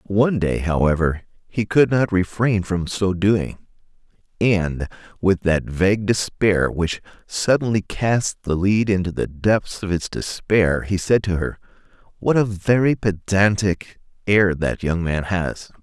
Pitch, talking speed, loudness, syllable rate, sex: 95 Hz, 150 wpm, -20 LUFS, 4.0 syllables/s, male